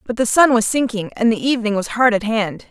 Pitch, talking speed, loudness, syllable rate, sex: 225 Hz, 265 wpm, -17 LUFS, 5.9 syllables/s, female